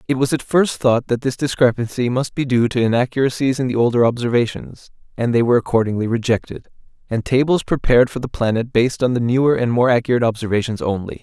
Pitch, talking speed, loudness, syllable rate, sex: 120 Hz, 200 wpm, -18 LUFS, 6.5 syllables/s, male